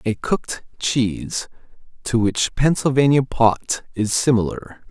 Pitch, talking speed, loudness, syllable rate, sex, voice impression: 120 Hz, 110 wpm, -20 LUFS, 4.0 syllables/s, male, masculine, middle-aged, powerful, slightly hard, halting, cool, calm, slightly mature, wild, lively, kind, slightly strict